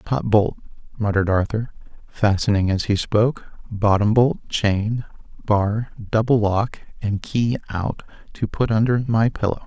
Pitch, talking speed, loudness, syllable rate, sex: 105 Hz, 135 wpm, -21 LUFS, 4.2 syllables/s, male